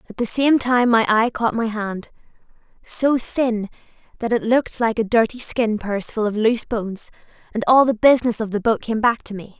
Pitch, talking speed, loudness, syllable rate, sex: 230 Hz, 215 wpm, -19 LUFS, 5.3 syllables/s, female